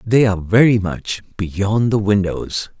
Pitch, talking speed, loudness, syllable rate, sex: 105 Hz, 150 wpm, -17 LUFS, 4.1 syllables/s, male